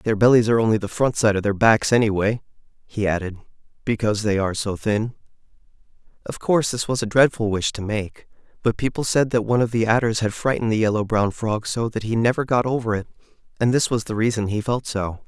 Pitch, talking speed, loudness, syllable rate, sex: 110 Hz, 220 wpm, -21 LUFS, 6.2 syllables/s, male